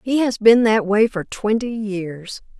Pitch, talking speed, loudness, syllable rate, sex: 215 Hz, 185 wpm, -18 LUFS, 3.8 syllables/s, female